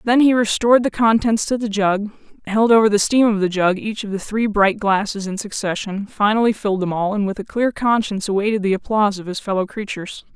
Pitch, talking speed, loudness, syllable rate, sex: 210 Hz, 225 wpm, -18 LUFS, 5.9 syllables/s, female